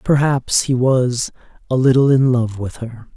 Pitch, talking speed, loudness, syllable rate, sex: 125 Hz, 170 wpm, -16 LUFS, 4.2 syllables/s, male